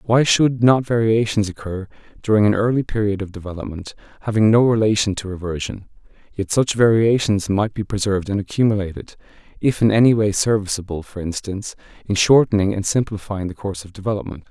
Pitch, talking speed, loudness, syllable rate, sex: 105 Hz, 160 wpm, -19 LUFS, 6.0 syllables/s, male